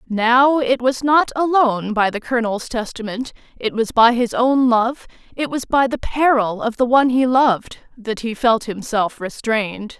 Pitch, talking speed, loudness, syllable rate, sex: 235 Hz, 180 wpm, -18 LUFS, 4.6 syllables/s, female